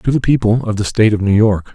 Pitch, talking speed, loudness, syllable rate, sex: 110 Hz, 310 wpm, -14 LUFS, 6.4 syllables/s, male